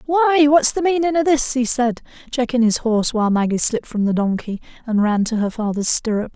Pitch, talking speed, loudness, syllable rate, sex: 240 Hz, 215 wpm, -18 LUFS, 5.7 syllables/s, female